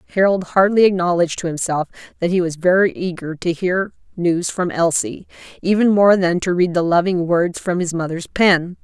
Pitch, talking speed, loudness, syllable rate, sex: 175 Hz, 185 wpm, -18 LUFS, 5.2 syllables/s, female